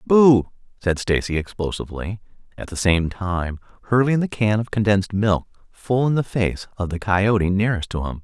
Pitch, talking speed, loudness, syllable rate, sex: 105 Hz, 175 wpm, -21 LUFS, 5.1 syllables/s, male